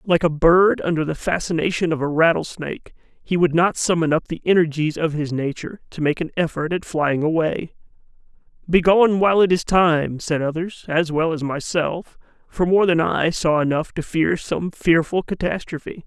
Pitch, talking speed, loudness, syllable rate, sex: 165 Hz, 180 wpm, -20 LUFS, 5.0 syllables/s, male